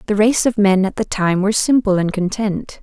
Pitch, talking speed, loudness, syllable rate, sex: 205 Hz, 235 wpm, -16 LUFS, 5.3 syllables/s, female